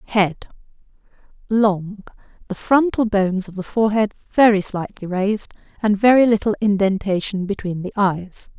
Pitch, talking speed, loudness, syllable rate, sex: 205 Hz, 120 wpm, -19 LUFS, 4.9 syllables/s, female